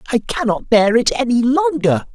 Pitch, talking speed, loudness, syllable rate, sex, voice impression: 225 Hz, 170 wpm, -16 LUFS, 4.9 syllables/s, male, masculine, very adult-like, muffled, unique, slightly kind